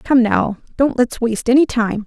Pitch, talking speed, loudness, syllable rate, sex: 240 Hz, 205 wpm, -16 LUFS, 4.9 syllables/s, female